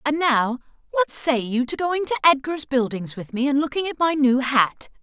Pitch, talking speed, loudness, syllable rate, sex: 275 Hz, 215 wpm, -21 LUFS, 4.9 syllables/s, female